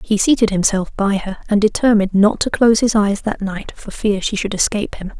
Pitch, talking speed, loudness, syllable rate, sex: 205 Hz, 230 wpm, -17 LUFS, 5.7 syllables/s, female